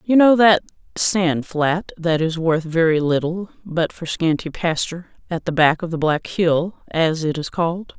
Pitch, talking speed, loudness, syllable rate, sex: 170 Hz, 190 wpm, -19 LUFS, 4.4 syllables/s, female